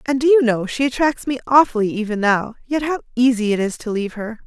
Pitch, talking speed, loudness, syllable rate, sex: 240 Hz, 240 wpm, -18 LUFS, 6.0 syllables/s, female